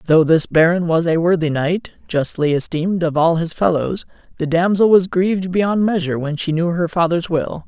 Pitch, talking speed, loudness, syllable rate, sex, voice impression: 170 Hz, 195 wpm, -17 LUFS, 5.2 syllables/s, male, very masculine, very middle-aged, slightly thick, tensed, very powerful, bright, slightly soft, clear, fluent, cool, intellectual, slightly refreshing, sincere, calm, very mature, very friendly, very reassuring, unique, slightly elegant, wild, sweet, lively, kind, slightly modest